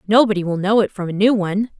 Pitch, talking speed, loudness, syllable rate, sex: 200 Hz, 265 wpm, -18 LUFS, 7.0 syllables/s, female